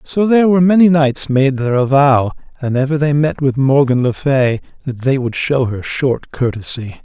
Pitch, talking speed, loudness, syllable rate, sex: 140 Hz, 195 wpm, -14 LUFS, 4.9 syllables/s, male